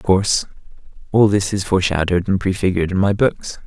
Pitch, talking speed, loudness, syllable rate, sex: 95 Hz, 180 wpm, -18 LUFS, 6.5 syllables/s, male